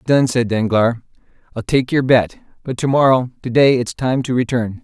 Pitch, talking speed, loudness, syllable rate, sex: 125 Hz, 200 wpm, -16 LUFS, 5.2 syllables/s, male